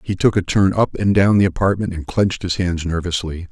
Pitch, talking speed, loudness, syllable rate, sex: 90 Hz, 240 wpm, -18 LUFS, 5.6 syllables/s, male